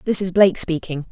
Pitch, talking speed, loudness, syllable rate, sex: 180 Hz, 215 wpm, -18 LUFS, 6.4 syllables/s, female